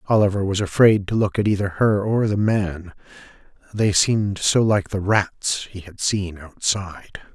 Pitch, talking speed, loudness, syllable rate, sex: 100 Hz, 170 wpm, -20 LUFS, 4.6 syllables/s, male